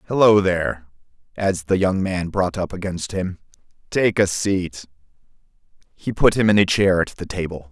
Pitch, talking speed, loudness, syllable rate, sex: 95 Hz, 170 wpm, -20 LUFS, 4.8 syllables/s, male